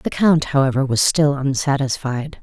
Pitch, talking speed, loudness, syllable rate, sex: 135 Hz, 150 wpm, -18 LUFS, 4.6 syllables/s, female